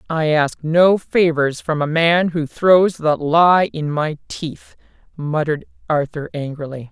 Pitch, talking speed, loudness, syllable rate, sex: 155 Hz, 145 wpm, -17 LUFS, 3.8 syllables/s, female